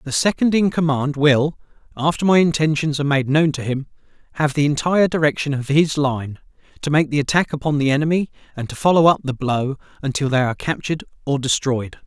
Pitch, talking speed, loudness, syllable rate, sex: 145 Hz, 195 wpm, -19 LUFS, 6.0 syllables/s, male